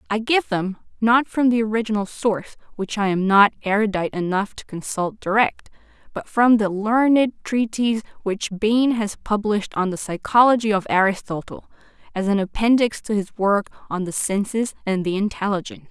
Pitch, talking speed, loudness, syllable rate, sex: 210 Hz, 160 wpm, -21 LUFS, 5.3 syllables/s, female